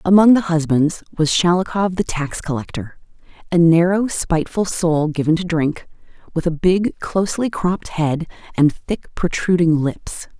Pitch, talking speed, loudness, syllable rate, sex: 170 Hz, 140 wpm, -18 LUFS, 4.6 syllables/s, female